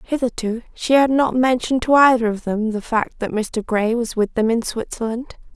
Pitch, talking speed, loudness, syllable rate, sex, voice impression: 235 Hz, 205 wpm, -19 LUFS, 5.0 syllables/s, female, very feminine, very young, very thin, slightly tensed, slightly weak, bright, soft, clear, fluent, slightly raspy, very cute, intellectual, very refreshing, sincere, very calm, friendly, very reassuring, very unique, elegant, slightly wild, very sweet, slightly lively, kind, slightly sharp, slightly modest, light